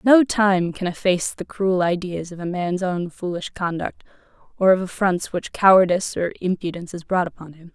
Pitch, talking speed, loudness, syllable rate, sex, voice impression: 180 Hz, 185 wpm, -21 LUFS, 5.3 syllables/s, female, feminine, adult-like, tensed, bright, clear, fluent, intellectual, calm, friendly, elegant, kind, modest